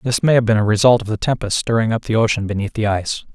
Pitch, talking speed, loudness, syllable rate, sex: 110 Hz, 285 wpm, -17 LUFS, 6.9 syllables/s, male